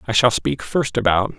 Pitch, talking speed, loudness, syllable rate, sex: 120 Hz, 215 wpm, -19 LUFS, 5.0 syllables/s, male